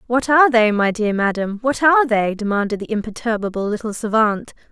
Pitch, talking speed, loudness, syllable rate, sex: 225 Hz, 180 wpm, -18 LUFS, 5.8 syllables/s, female